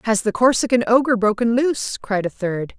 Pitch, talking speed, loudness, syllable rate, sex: 225 Hz, 195 wpm, -19 LUFS, 5.4 syllables/s, female